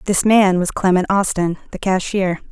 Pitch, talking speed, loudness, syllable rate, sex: 190 Hz, 165 wpm, -17 LUFS, 4.8 syllables/s, female